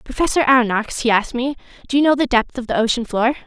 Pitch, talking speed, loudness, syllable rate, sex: 250 Hz, 240 wpm, -18 LUFS, 6.8 syllables/s, female